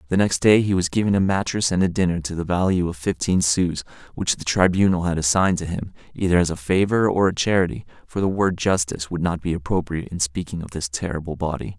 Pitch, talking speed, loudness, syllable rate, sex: 90 Hz, 230 wpm, -21 LUFS, 6.2 syllables/s, male